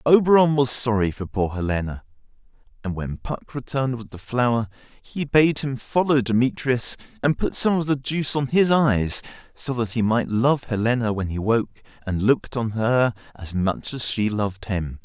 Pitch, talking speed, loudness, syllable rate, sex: 120 Hz, 185 wpm, -22 LUFS, 4.8 syllables/s, male